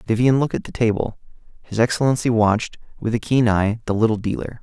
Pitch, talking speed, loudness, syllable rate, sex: 115 Hz, 195 wpm, -20 LUFS, 6.4 syllables/s, male